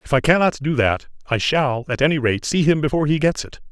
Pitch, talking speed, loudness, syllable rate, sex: 140 Hz, 260 wpm, -19 LUFS, 6.0 syllables/s, male